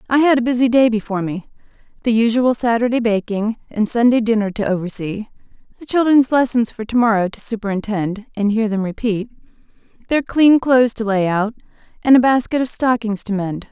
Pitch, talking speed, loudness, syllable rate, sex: 225 Hz, 180 wpm, -17 LUFS, 5.6 syllables/s, female